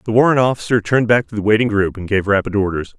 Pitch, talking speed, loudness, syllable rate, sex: 110 Hz, 260 wpm, -16 LUFS, 7.0 syllables/s, male